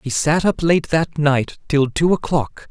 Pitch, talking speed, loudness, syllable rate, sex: 150 Hz, 200 wpm, -18 LUFS, 3.9 syllables/s, male